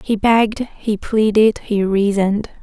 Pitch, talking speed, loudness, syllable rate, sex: 210 Hz, 135 wpm, -16 LUFS, 4.2 syllables/s, female